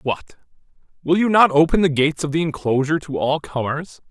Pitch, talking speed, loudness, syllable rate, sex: 150 Hz, 190 wpm, -19 LUFS, 5.8 syllables/s, male